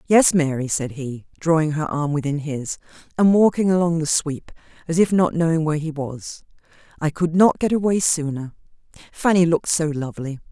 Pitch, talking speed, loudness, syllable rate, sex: 160 Hz, 175 wpm, -20 LUFS, 5.3 syllables/s, female